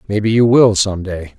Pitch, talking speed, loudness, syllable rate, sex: 105 Hz, 215 wpm, -13 LUFS, 5.0 syllables/s, male